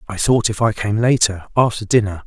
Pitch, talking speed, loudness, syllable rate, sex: 105 Hz, 210 wpm, -17 LUFS, 5.5 syllables/s, male